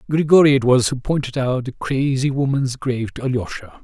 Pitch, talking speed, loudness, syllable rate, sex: 130 Hz, 190 wpm, -18 LUFS, 5.5 syllables/s, male